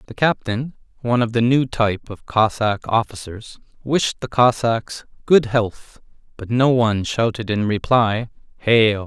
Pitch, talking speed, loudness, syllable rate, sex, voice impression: 115 Hz, 130 wpm, -19 LUFS, 4.2 syllables/s, male, masculine, adult-like, bright, fluent, refreshing, calm, friendly, reassuring, kind